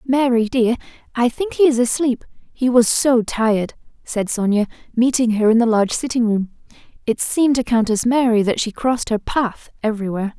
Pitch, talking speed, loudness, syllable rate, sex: 235 Hz, 175 wpm, -18 LUFS, 3.5 syllables/s, female